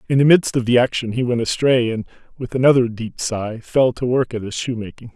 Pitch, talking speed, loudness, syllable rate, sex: 120 Hz, 235 wpm, -18 LUFS, 5.6 syllables/s, male